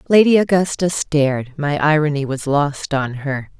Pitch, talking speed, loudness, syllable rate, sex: 150 Hz, 135 wpm, -18 LUFS, 4.5 syllables/s, female